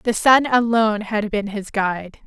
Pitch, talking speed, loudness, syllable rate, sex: 215 Hz, 185 wpm, -19 LUFS, 4.7 syllables/s, female